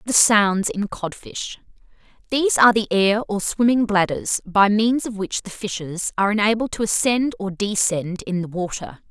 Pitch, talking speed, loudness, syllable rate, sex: 205 Hz, 165 wpm, -20 LUFS, 4.8 syllables/s, female